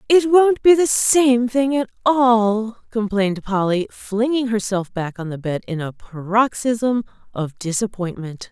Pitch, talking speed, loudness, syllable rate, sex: 225 Hz, 150 wpm, -19 LUFS, 4.0 syllables/s, female